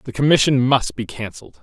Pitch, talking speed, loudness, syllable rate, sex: 120 Hz, 185 wpm, -18 LUFS, 5.7 syllables/s, male